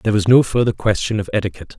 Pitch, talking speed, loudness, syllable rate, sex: 105 Hz, 235 wpm, -17 LUFS, 7.8 syllables/s, male